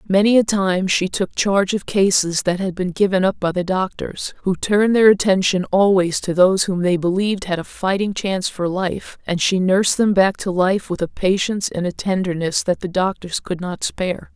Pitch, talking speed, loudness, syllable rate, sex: 190 Hz, 215 wpm, -18 LUFS, 5.1 syllables/s, female